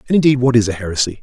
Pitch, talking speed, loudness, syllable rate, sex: 120 Hz, 295 wpm, -15 LUFS, 8.6 syllables/s, male